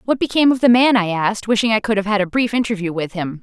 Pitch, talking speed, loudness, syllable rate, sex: 215 Hz, 295 wpm, -17 LUFS, 7.0 syllables/s, female